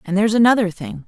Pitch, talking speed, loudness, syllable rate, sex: 205 Hz, 225 wpm, -16 LUFS, 7.2 syllables/s, female